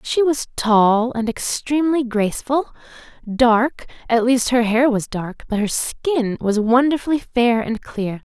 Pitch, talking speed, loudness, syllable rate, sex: 240 Hz, 145 wpm, -19 LUFS, 4.0 syllables/s, female